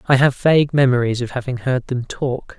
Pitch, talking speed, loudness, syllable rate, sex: 130 Hz, 210 wpm, -18 LUFS, 5.4 syllables/s, male